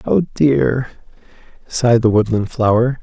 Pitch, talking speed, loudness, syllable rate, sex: 120 Hz, 120 wpm, -16 LUFS, 4.3 syllables/s, male